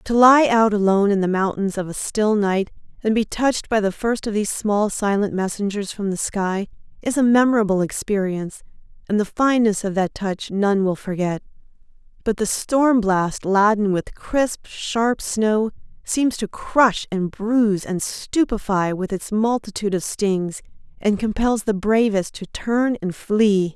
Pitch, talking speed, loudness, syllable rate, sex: 210 Hz, 170 wpm, -20 LUFS, 4.5 syllables/s, female